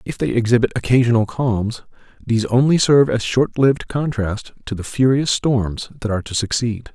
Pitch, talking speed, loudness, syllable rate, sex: 120 Hz, 165 wpm, -18 LUFS, 5.3 syllables/s, male